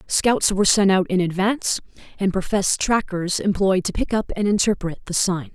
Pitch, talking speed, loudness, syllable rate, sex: 195 Hz, 185 wpm, -20 LUFS, 5.3 syllables/s, female